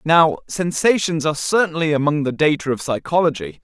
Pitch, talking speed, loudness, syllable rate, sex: 155 Hz, 150 wpm, -18 LUFS, 5.5 syllables/s, male